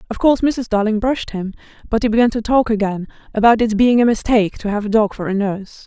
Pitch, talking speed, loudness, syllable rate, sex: 220 Hz, 245 wpm, -17 LUFS, 6.5 syllables/s, female